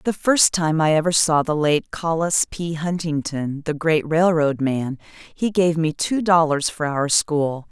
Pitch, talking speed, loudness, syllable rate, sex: 160 Hz, 180 wpm, -20 LUFS, 4.0 syllables/s, female